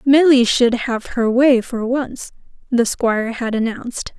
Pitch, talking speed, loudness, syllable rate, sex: 245 Hz, 160 wpm, -17 LUFS, 4.1 syllables/s, female